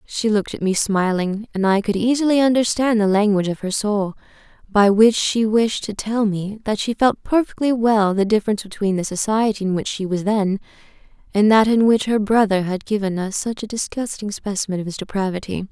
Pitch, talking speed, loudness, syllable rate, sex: 210 Hz, 200 wpm, -19 LUFS, 5.5 syllables/s, female